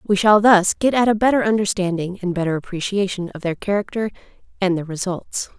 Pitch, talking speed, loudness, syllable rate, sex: 195 Hz, 185 wpm, -19 LUFS, 5.7 syllables/s, female